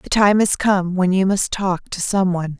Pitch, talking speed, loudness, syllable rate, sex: 190 Hz, 255 wpm, -18 LUFS, 4.7 syllables/s, female